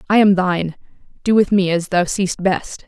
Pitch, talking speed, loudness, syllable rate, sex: 185 Hz, 210 wpm, -17 LUFS, 4.9 syllables/s, female